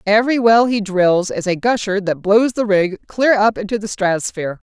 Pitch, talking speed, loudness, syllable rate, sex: 205 Hz, 205 wpm, -16 LUFS, 5.1 syllables/s, female